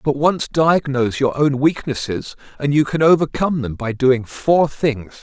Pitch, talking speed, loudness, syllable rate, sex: 140 Hz, 170 wpm, -18 LUFS, 4.6 syllables/s, male